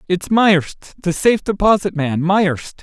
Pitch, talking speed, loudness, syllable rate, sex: 185 Hz, 130 wpm, -16 LUFS, 4.1 syllables/s, male